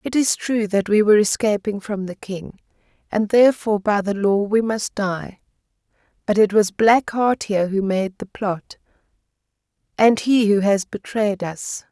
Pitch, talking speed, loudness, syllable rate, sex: 205 Hz, 170 wpm, -19 LUFS, 4.6 syllables/s, female